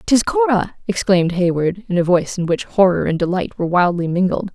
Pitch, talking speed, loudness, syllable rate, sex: 180 Hz, 200 wpm, -17 LUFS, 5.9 syllables/s, female